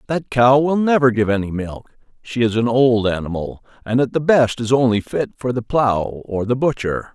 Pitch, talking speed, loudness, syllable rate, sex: 120 Hz, 210 wpm, -18 LUFS, 4.9 syllables/s, male